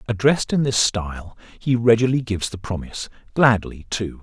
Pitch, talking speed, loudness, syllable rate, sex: 110 Hz, 140 wpm, -20 LUFS, 5.5 syllables/s, male